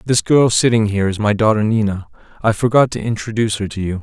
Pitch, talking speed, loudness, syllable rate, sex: 110 Hz, 225 wpm, -16 LUFS, 6.4 syllables/s, male